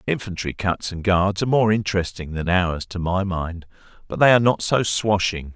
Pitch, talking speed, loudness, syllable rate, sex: 95 Hz, 195 wpm, -21 LUFS, 5.2 syllables/s, male